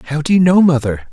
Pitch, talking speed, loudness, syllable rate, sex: 150 Hz, 270 wpm, -13 LUFS, 5.7 syllables/s, male